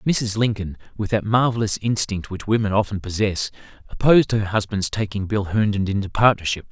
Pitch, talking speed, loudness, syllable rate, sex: 105 Hz, 160 wpm, -21 LUFS, 5.5 syllables/s, male